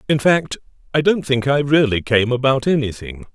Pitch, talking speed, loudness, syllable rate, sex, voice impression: 130 Hz, 180 wpm, -17 LUFS, 5.1 syllables/s, male, very masculine, middle-aged, very thick, very tensed, very powerful, bright, slightly soft, very clear, fluent, very cool, intellectual, refreshing, sincere, calm, very mature, very friendly, very reassuring, very unique, elegant, wild, slightly sweet, very lively, kind, intense